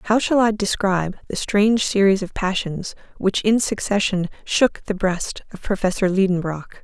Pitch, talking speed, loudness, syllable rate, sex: 195 Hz, 160 wpm, -20 LUFS, 4.8 syllables/s, female